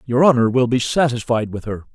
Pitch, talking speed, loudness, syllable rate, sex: 120 Hz, 215 wpm, -18 LUFS, 5.8 syllables/s, male